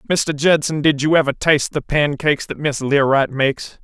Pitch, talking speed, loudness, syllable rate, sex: 145 Hz, 190 wpm, -17 LUFS, 5.3 syllables/s, male